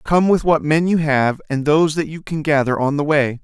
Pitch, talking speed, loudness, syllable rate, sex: 150 Hz, 260 wpm, -17 LUFS, 5.2 syllables/s, male